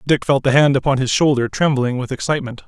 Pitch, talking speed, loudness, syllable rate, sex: 135 Hz, 225 wpm, -17 LUFS, 6.4 syllables/s, male